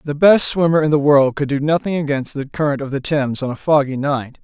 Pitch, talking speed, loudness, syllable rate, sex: 145 Hz, 255 wpm, -17 LUFS, 5.8 syllables/s, male